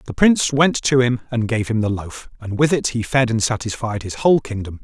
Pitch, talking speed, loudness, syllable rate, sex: 120 Hz, 250 wpm, -19 LUFS, 5.6 syllables/s, male